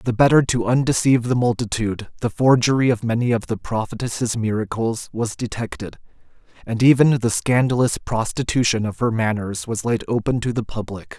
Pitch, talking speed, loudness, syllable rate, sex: 115 Hz, 160 wpm, -20 LUFS, 5.4 syllables/s, male